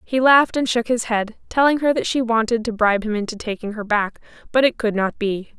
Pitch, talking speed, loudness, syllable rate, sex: 230 Hz, 245 wpm, -19 LUFS, 5.7 syllables/s, female